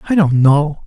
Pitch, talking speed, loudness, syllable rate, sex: 155 Hz, 210 wpm, -13 LUFS, 4.4 syllables/s, male